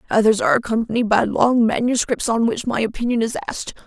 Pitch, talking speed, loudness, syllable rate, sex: 225 Hz, 185 wpm, -19 LUFS, 6.2 syllables/s, female